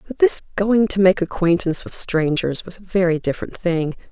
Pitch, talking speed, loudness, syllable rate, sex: 185 Hz, 190 wpm, -19 LUFS, 5.4 syllables/s, female